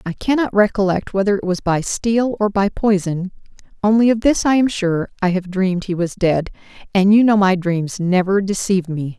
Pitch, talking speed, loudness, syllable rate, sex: 195 Hz, 205 wpm, -17 LUFS, 5.1 syllables/s, female